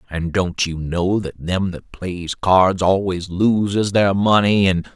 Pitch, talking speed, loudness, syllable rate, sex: 95 Hz, 170 wpm, -18 LUFS, 3.6 syllables/s, male